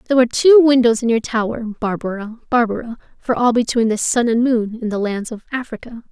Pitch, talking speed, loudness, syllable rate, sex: 235 Hz, 205 wpm, -17 LUFS, 5.8 syllables/s, female